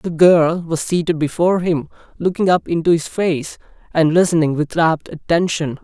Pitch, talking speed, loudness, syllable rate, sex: 165 Hz, 165 wpm, -17 LUFS, 4.8 syllables/s, male